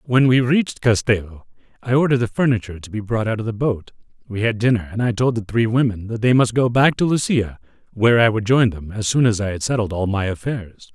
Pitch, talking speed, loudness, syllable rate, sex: 115 Hz, 245 wpm, -19 LUFS, 6.1 syllables/s, male